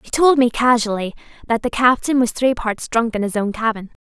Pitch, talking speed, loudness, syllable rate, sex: 235 Hz, 225 wpm, -18 LUFS, 5.4 syllables/s, female